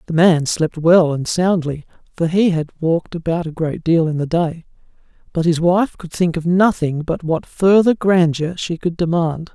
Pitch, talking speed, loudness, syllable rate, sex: 170 Hz, 195 wpm, -17 LUFS, 4.6 syllables/s, male